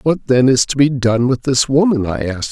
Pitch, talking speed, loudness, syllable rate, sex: 130 Hz, 265 wpm, -14 LUFS, 5.4 syllables/s, male